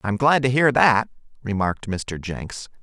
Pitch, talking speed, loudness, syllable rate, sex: 115 Hz, 170 wpm, -21 LUFS, 4.4 syllables/s, male